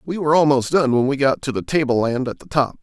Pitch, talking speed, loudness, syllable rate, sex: 140 Hz, 275 wpm, -19 LUFS, 6.3 syllables/s, male